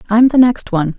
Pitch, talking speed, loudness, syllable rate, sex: 220 Hz, 245 wpm, -12 LUFS, 6.3 syllables/s, female